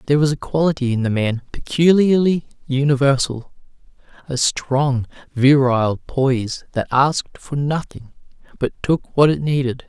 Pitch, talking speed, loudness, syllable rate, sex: 140 Hz, 135 wpm, -18 LUFS, 4.7 syllables/s, male